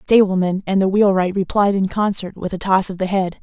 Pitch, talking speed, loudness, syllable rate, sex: 190 Hz, 245 wpm, -18 LUFS, 5.7 syllables/s, female